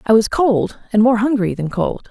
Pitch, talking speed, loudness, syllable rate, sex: 225 Hz, 230 wpm, -17 LUFS, 4.8 syllables/s, female